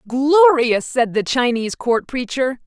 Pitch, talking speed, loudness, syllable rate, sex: 255 Hz, 135 wpm, -17 LUFS, 4.1 syllables/s, female